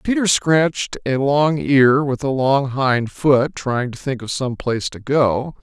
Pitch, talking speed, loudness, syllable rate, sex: 135 Hz, 190 wpm, -18 LUFS, 3.9 syllables/s, male